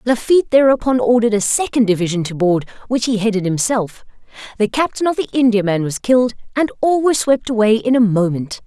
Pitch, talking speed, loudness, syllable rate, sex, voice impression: 230 Hz, 185 wpm, -16 LUFS, 6.1 syllables/s, female, feminine, adult-like, tensed, slightly powerful, clear, fluent, intellectual, slightly friendly, elegant, lively, slightly strict, slightly sharp